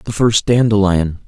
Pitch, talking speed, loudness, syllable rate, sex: 105 Hz, 140 wpm, -14 LUFS, 4.2 syllables/s, male